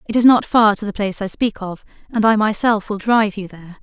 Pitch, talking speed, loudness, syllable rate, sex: 210 Hz, 265 wpm, -17 LUFS, 6.1 syllables/s, female